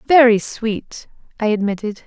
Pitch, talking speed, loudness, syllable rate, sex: 225 Hz, 115 wpm, -18 LUFS, 4.2 syllables/s, female